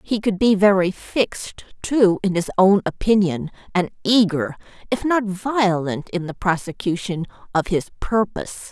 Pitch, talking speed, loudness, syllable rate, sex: 190 Hz, 145 wpm, -20 LUFS, 4.4 syllables/s, female